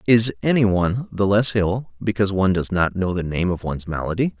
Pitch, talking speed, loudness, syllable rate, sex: 100 Hz, 220 wpm, -20 LUFS, 6.0 syllables/s, male